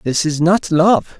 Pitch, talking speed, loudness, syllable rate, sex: 170 Hz, 200 wpm, -15 LUFS, 3.7 syllables/s, male